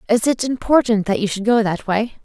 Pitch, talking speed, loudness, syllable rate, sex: 220 Hz, 240 wpm, -18 LUFS, 5.6 syllables/s, female